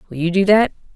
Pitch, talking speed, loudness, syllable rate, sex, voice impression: 190 Hz, 250 wpm, -16 LUFS, 7.4 syllables/s, female, very feminine, adult-like, thin, slightly tensed, slightly weak, slightly dark, soft, clear, slightly fluent, slightly raspy, cute, slightly cool, intellectual, slightly refreshing, sincere, very calm, friendly, very reassuring, unique, very elegant, slightly wild, sweet, slightly lively, kind, modest, slightly light